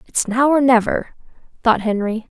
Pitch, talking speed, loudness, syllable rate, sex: 235 Hz, 150 wpm, -17 LUFS, 4.7 syllables/s, female